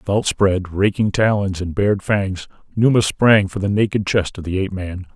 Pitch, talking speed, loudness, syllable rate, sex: 100 Hz, 200 wpm, -18 LUFS, 5.0 syllables/s, male